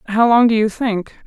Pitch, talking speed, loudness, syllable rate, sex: 220 Hz, 235 wpm, -15 LUFS, 5.1 syllables/s, female